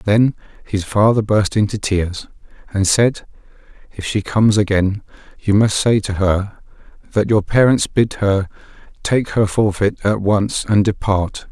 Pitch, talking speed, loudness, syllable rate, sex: 105 Hz, 150 wpm, -17 LUFS, 4.2 syllables/s, male